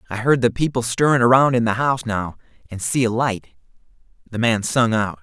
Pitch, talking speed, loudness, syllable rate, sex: 120 Hz, 205 wpm, -19 LUFS, 5.6 syllables/s, male